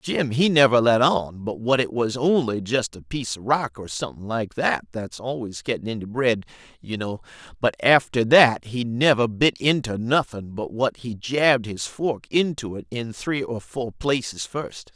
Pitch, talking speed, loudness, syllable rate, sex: 120 Hz, 195 wpm, -22 LUFS, 4.5 syllables/s, male